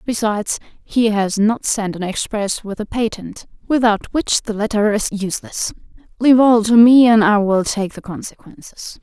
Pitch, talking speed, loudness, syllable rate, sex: 215 Hz, 175 wpm, -16 LUFS, 4.8 syllables/s, female